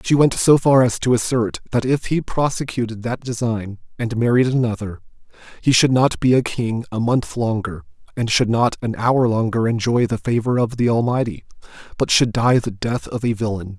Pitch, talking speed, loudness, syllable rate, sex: 120 Hz, 195 wpm, -19 LUFS, 5.1 syllables/s, male